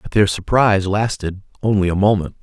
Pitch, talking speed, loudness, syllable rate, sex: 100 Hz, 175 wpm, -17 LUFS, 5.7 syllables/s, male